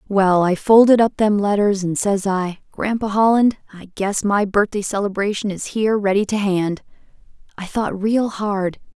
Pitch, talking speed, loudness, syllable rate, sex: 205 Hz, 170 wpm, -18 LUFS, 4.6 syllables/s, female